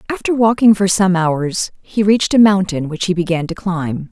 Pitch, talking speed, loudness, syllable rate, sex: 190 Hz, 205 wpm, -15 LUFS, 5.0 syllables/s, female